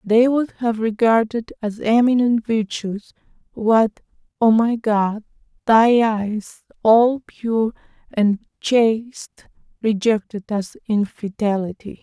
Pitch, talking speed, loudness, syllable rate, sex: 220 Hz, 100 wpm, -19 LUFS, 3.4 syllables/s, female